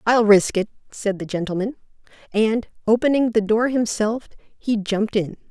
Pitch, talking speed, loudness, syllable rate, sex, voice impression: 220 Hz, 155 wpm, -21 LUFS, 4.8 syllables/s, female, feminine, adult-like, tensed, bright, clear, fluent, intellectual, friendly, elegant, lively, kind, light